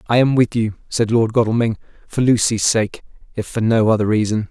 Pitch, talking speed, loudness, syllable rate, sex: 110 Hz, 200 wpm, -17 LUFS, 5.5 syllables/s, male